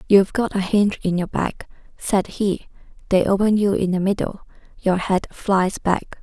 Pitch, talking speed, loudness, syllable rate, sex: 195 Hz, 185 wpm, -21 LUFS, 4.7 syllables/s, female